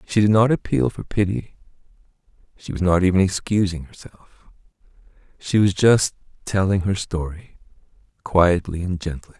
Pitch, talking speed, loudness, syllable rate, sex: 95 Hz, 135 wpm, -20 LUFS, 4.9 syllables/s, male